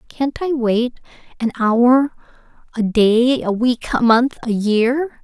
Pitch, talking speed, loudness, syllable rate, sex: 240 Hz, 140 wpm, -17 LUFS, 3.4 syllables/s, female